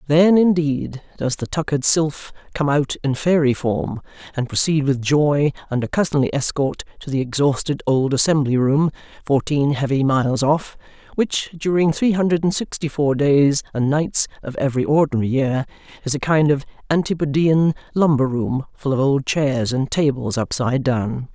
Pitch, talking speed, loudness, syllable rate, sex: 145 Hz, 160 wpm, -19 LUFS, 4.9 syllables/s, female